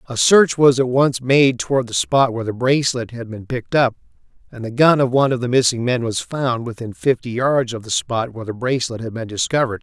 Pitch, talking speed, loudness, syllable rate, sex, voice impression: 125 Hz, 240 wpm, -18 LUFS, 5.9 syllables/s, male, very masculine, very adult-like, old, very thick, slightly tensed, powerful, slightly bright, slightly soft, clear, fluent, slightly raspy, very cool, intellectual, very sincere, calm, very mature, friendly, very reassuring, very unique, elegant, wild, slightly sweet, lively, strict